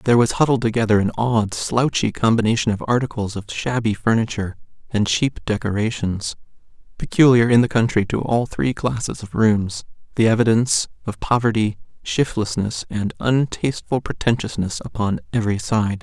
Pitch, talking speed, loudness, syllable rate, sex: 110 Hz, 140 wpm, -20 LUFS, 5.3 syllables/s, male